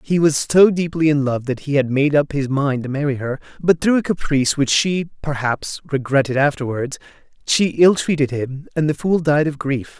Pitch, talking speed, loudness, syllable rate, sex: 145 Hz, 210 wpm, -18 LUFS, 5.0 syllables/s, male